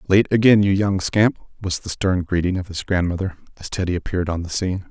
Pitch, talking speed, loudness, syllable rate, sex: 95 Hz, 220 wpm, -20 LUFS, 6.0 syllables/s, male